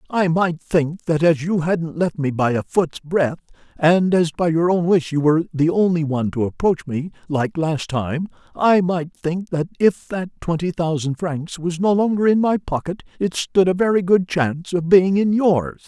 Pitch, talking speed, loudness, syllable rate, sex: 170 Hz, 210 wpm, -19 LUFS, 4.5 syllables/s, male